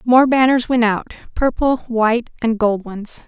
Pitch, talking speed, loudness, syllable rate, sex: 235 Hz, 145 wpm, -17 LUFS, 4.4 syllables/s, female